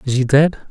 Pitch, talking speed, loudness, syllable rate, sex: 140 Hz, 255 wpm, -15 LUFS, 6.7 syllables/s, male